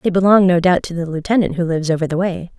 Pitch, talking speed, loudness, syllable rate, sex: 175 Hz, 280 wpm, -16 LUFS, 7.0 syllables/s, female